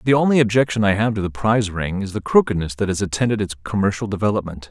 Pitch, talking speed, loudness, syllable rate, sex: 105 Hz, 230 wpm, -19 LUFS, 6.9 syllables/s, male